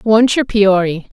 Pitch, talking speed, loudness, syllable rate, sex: 210 Hz, 150 wpm, -13 LUFS, 3.9 syllables/s, female